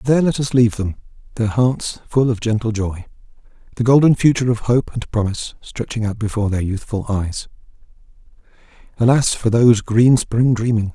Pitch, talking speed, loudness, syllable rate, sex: 115 Hz, 165 wpm, -18 LUFS, 5.5 syllables/s, male